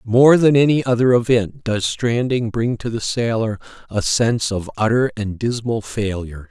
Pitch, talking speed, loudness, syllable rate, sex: 115 Hz, 165 wpm, -18 LUFS, 4.6 syllables/s, male